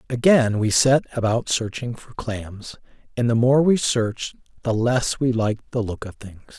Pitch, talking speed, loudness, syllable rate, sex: 120 Hz, 180 wpm, -21 LUFS, 4.6 syllables/s, male